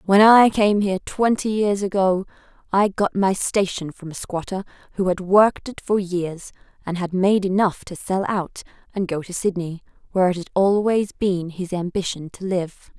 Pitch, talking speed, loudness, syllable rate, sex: 190 Hz, 185 wpm, -21 LUFS, 4.8 syllables/s, female